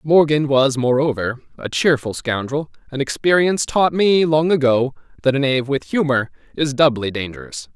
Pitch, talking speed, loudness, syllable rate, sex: 135 Hz, 155 wpm, -18 LUFS, 5.1 syllables/s, male